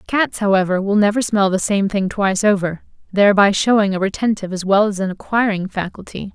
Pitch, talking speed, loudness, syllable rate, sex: 200 Hz, 190 wpm, -17 LUFS, 5.9 syllables/s, female